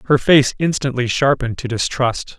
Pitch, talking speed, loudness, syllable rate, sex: 130 Hz, 150 wpm, -17 LUFS, 5.1 syllables/s, male